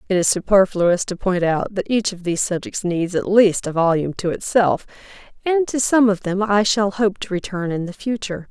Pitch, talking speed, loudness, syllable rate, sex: 195 Hz, 220 wpm, -19 LUFS, 5.3 syllables/s, female